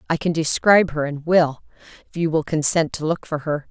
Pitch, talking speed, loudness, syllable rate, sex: 160 Hz, 225 wpm, -20 LUFS, 5.5 syllables/s, female